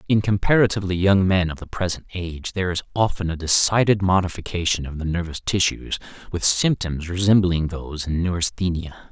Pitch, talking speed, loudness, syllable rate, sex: 90 Hz, 160 wpm, -21 LUFS, 5.7 syllables/s, male